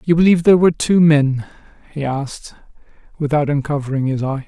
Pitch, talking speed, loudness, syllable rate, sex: 150 Hz, 160 wpm, -16 LUFS, 6.5 syllables/s, male